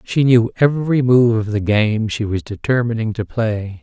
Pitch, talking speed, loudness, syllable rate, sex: 115 Hz, 190 wpm, -17 LUFS, 4.7 syllables/s, male